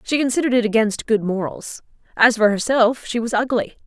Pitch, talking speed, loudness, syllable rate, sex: 230 Hz, 185 wpm, -19 LUFS, 5.7 syllables/s, female